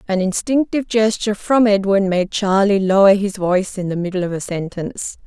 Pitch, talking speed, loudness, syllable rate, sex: 200 Hz, 180 wpm, -17 LUFS, 5.6 syllables/s, female